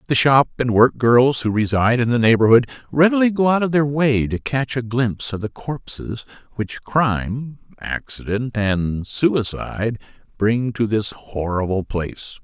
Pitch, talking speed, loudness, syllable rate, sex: 120 Hz, 160 wpm, -19 LUFS, 4.5 syllables/s, male